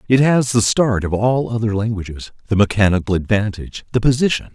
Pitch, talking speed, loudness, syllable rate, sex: 110 Hz, 145 wpm, -17 LUFS, 5.9 syllables/s, male